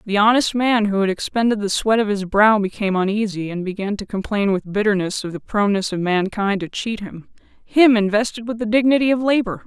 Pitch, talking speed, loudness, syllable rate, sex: 210 Hz, 205 wpm, -19 LUFS, 5.8 syllables/s, female